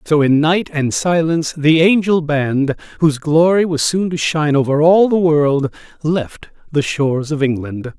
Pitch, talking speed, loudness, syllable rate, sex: 155 Hz, 175 wpm, -15 LUFS, 4.5 syllables/s, male